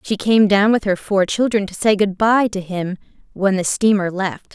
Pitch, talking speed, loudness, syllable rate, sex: 200 Hz, 225 wpm, -17 LUFS, 4.7 syllables/s, female